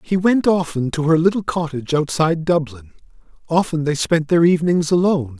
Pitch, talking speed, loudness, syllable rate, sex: 160 Hz, 165 wpm, -18 LUFS, 5.7 syllables/s, male